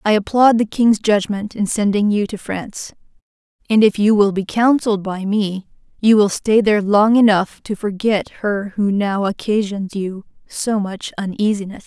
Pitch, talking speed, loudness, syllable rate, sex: 205 Hz, 170 wpm, -17 LUFS, 4.6 syllables/s, female